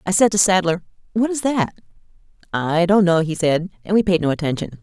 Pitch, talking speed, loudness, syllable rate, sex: 185 Hz, 210 wpm, -19 LUFS, 5.6 syllables/s, female